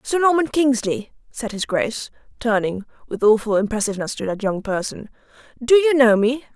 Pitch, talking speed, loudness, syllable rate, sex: 235 Hz, 165 wpm, -20 LUFS, 5.5 syllables/s, female